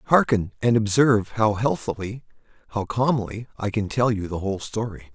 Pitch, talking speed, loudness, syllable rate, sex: 110 Hz, 150 wpm, -23 LUFS, 5.1 syllables/s, male